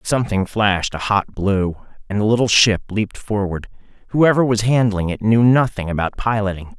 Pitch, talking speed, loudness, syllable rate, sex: 105 Hz, 170 wpm, -18 LUFS, 5.2 syllables/s, male